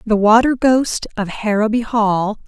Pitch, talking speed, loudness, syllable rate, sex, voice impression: 220 Hz, 145 wpm, -16 LUFS, 4.1 syllables/s, female, feminine, adult-like, tensed, powerful, slightly bright, clear, slightly fluent, intellectual, slightly friendly, unique, elegant, lively, slightly intense